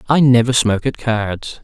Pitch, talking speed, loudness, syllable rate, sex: 120 Hz, 185 wpm, -15 LUFS, 4.8 syllables/s, male